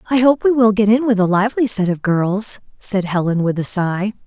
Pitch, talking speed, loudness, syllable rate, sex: 210 Hz, 240 wpm, -17 LUFS, 5.3 syllables/s, female